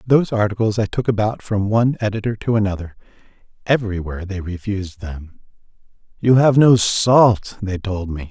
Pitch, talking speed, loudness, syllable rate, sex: 105 Hz, 150 wpm, -18 LUFS, 5.4 syllables/s, male